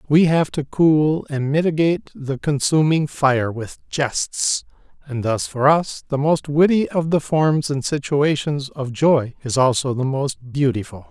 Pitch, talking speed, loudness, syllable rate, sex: 145 Hz, 160 wpm, -19 LUFS, 4.0 syllables/s, male